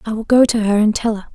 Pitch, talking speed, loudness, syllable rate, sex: 220 Hz, 355 wpm, -15 LUFS, 6.5 syllables/s, female